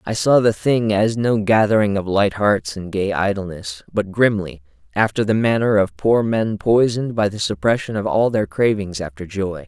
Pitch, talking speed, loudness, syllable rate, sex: 105 Hz, 185 wpm, -19 LUFS, 4.8 syllables/s, male